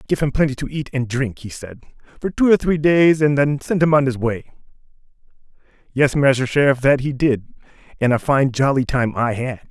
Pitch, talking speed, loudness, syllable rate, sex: 135 Hz, 210 wpm, -18 LUFS, 5.3 syllables/s, male